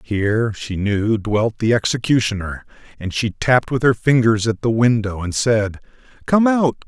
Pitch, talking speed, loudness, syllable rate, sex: 115 Hz, 165 wpm, -18 LUFS, 4.6 syllables/s, male